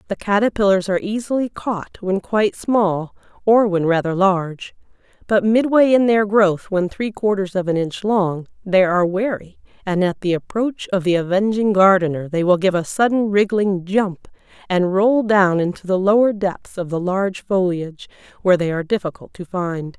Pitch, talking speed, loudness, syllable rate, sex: 195 Hz, 175 wpm, -18 LUFS, 5.0 syllables/s, female